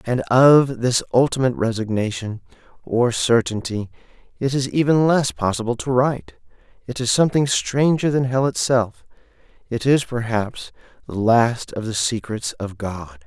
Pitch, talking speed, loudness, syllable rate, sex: 120 Hz, 140 wpm, -20 LUFS, 4.6 syllables/s, male